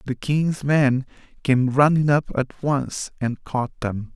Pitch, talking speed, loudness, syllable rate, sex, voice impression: 135 Hz, 160 wpm, -22 LUFS, 3.5 syllables/s, male, masculine, adult-like, thin, relaxed, slightly weak, soft, raspy, calm, friendly, reassuring, kind, modest